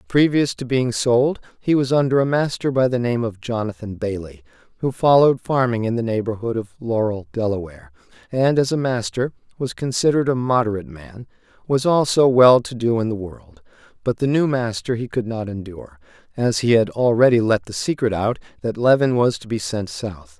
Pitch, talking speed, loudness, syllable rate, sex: 115 Hz, 185 wpm, -20 LUFS, 5.4 syllables/s, male